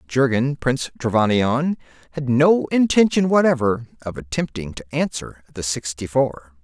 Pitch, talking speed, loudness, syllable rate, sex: 130 Hz, 120 wpm, -20 LUFS, 4.8 syllables/s, male